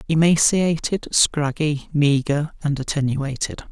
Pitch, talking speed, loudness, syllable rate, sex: 150 Hz, 80 wpm, -20 LUFS, 3.9 syllables/s, male